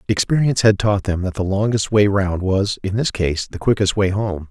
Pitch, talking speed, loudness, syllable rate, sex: 100 Hz, 225 wpm, -18 LUFS, 5.2 syllables/s, male